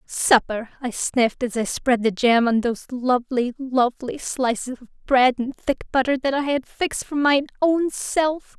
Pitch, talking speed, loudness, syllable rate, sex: 255 Hz, 180 wpm, -21 LUFS, 4.7 syllables/s, female